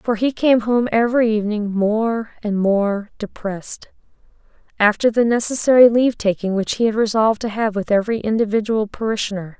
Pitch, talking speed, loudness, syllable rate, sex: 220 Hz, 155 wpm, -18 LUFS, 5.6 syllables/s, female